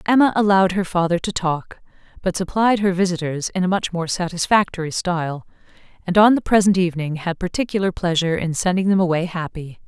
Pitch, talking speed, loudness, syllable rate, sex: 180 Hz, 170 wpm, -19 LUFS, 6.0 syllables/s, female